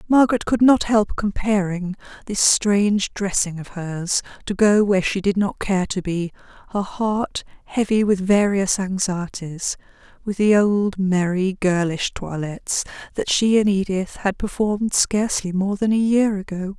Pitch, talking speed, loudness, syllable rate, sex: 195 Hz, 145 wpm, -20 LUFS, 4.4 syllables/s, female